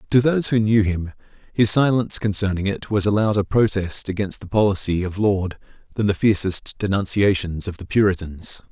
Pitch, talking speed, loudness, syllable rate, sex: 100 Hz, 170 wpm, -20 LUFS, 5.3 syllables/s, male